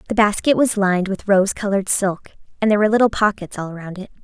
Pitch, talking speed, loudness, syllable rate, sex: 200 Hz, 225 wpm, -18 LUFS, 6.9 syllables/s, female